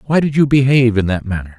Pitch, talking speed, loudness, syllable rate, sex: 120 Hz, 265 wpm, -14 LUFS, 7.0 syllables/s, male